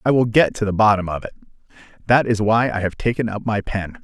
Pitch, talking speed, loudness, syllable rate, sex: 110 Hz, 255 wpm, -19 LUFS, 6.0 syllables/s, male